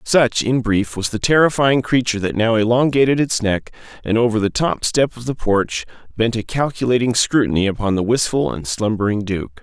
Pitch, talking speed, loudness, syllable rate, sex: 115 Hz, 185 wpm, -18 LUFS, 5.3 syllables/s, male